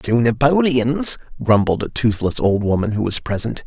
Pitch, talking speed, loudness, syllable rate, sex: 120 Hz, 165 wpm, -18 LUFS, 4.7 syllables/s, male